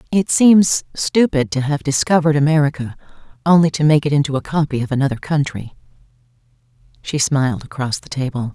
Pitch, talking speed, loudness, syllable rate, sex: 140 Hz, 155 wpm, -17 LUFS, 5.9 syllables/s, female